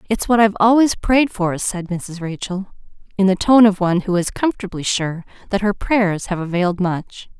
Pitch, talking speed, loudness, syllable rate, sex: 195 Hz, 195 wpm, -18 LUFS, 5.2 syllables/s, female